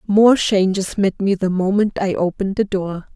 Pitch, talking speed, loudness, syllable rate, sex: 195 Hz, 190 wpm, -18 LUFS, 4.8 syllables/s, female